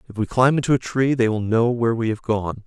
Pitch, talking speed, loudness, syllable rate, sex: 115 Hz, 290 wpm, -20 LUFS, 6.0 syllables/s, male